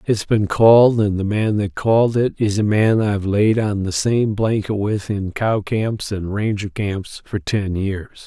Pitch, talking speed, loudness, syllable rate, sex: 105 Hz, 205 wpm, -18 LUFS, 4.1 syllables/s, male